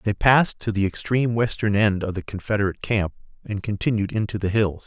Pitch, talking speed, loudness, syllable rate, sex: 105 Hz, 195 wpm, -23 LUFS, 6.1 syllables/s, male